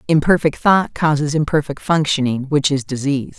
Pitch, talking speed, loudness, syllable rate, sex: 145 Hz, 140 wpm, -17 LUFS, 5.3 syllables/s, female